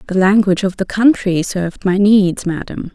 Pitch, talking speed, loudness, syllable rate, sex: 195 Hz, 185 wpm, -15 LUFS, 5.1 syllables/s, female